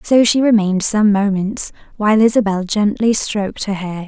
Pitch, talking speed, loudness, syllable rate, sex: 205 Hz, 160 wpm, -15 LUFS, 5.1 syllables/s, female